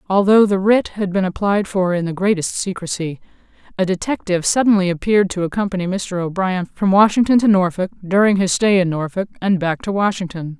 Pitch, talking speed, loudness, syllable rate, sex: 190 Hz, 180 wpm, -17 LUFS, 5.7 syllables/s, female